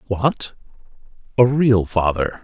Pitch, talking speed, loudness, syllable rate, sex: 110 Hz, 100 wpm, -18 LUFS, 3.5 syllables/s, male